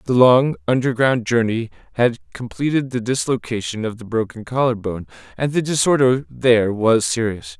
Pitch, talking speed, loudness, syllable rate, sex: 120 Hz, 150 wpm, -19 LUFS, 5.0 syllables/s, male